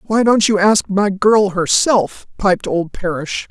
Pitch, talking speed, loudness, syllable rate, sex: 195 Hz, 170 wpm, -15 LUFS, 3.7 syllables/s, female